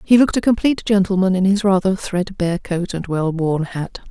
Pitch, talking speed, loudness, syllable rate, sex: 190 Hz, 205 wpm, -18 LUFS, 5.6 syllables/s, female